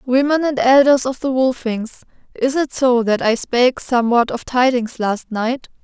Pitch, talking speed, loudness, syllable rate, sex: 250 Hz, 175 wpm, -17 LUFS, 4.6 syllables/s, female